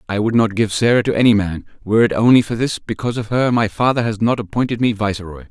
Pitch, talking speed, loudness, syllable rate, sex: 110 Hz, 250 wpm, -17 LUFS, 6.7 syllables/s, male